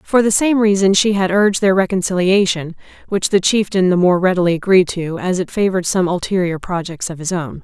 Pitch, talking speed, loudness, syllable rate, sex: 185 Hz, 205 wpm, -16 LUFS, 5.7 syllables/s, female